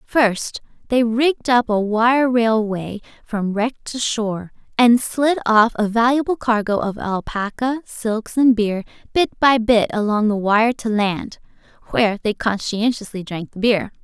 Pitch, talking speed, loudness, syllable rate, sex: 225 Hz, 155 wpm, -19 LUFS, 3.5 syllables/s, female